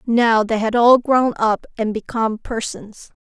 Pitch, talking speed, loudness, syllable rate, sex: 225 Hz, 165 wpm, -18 LUFS, 4.2 syllables/s, female